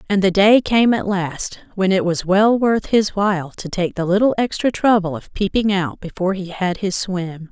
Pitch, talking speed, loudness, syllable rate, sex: 195 Hz, 215 wpm, -18 LUFS, 4.7 syllables/s, female